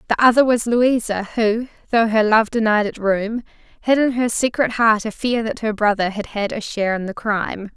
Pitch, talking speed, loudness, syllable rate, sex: 220 Hz, 215 wpm, -19 LUFS, 5.1 syllables/s, female